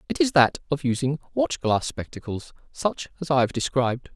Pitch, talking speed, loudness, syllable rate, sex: 140 Hz, 190 wpm, -24 LUFS, 5.3 syllables/s, male